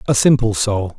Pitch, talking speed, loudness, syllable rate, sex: 115 Hz, 185 wpm, -16 LUFS, 5.0 syllables/s, male